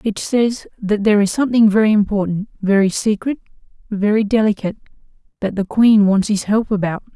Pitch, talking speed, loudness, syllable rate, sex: 210 Hz, 160 wpm, -16 LUFS, 5.7 syllables/s, female